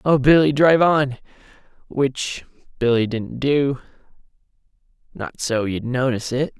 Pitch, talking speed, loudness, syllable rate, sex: 135 Hz, 120 wpm, -19 LUFS, 4.4 syllables/s, male